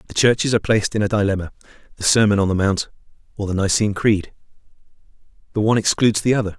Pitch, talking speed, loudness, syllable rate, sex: 105 Hz, 180 wpm, -19 LUFS, 7.7 syllables/s, male